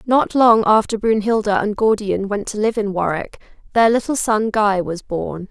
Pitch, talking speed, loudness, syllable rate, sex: 210 Hz, 185 wpm, -18 LUFS, 4.6 syllables/s, female